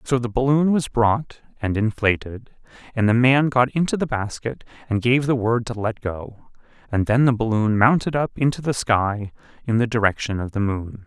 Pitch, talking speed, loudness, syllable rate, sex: 120 Hz, 195 wpm, -21 LUFS, 4.8 syllables/s, male